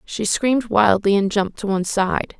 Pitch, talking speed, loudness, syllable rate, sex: 205 Hz, 200 wpm, -19 LUFS, 5.2 syllables/s, female